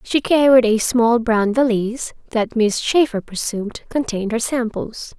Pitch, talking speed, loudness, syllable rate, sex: 230 Hz, 150 wpm, -18 LUFS, 4.5 syllables/s, female